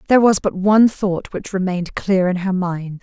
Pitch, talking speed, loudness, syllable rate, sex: 190 Hz, 220 wpm, -18 LUFS, 5.3 syllables/s, female